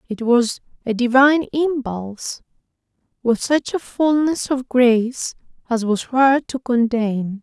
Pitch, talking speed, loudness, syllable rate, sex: 250 Hz, 130 wpm, -19 LUFS, 4.0 syllables/s, female